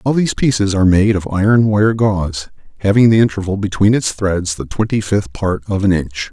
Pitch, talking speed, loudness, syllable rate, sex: 100 Hz, 210 wpm, -15 LUFS, 5.5 syllables/s, male